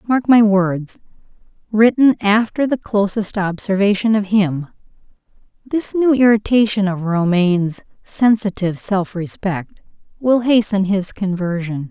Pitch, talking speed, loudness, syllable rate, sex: 205 Hz, 105 wpm, -17 LUFS, 4.2 syllables/s, female